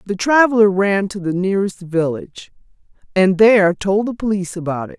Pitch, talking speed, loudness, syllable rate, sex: 195 Hz, 170 wpm, -16 LUFS, 5.7 syllables/s, female